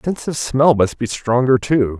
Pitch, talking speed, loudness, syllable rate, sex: 125 Hz, 210 wpm, -17 LUFS, 4.8 syllables/s, male